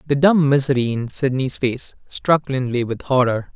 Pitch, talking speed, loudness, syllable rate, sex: 135 Hz, 170 wpm, -19 LUFS, 4.6 syllables/s, male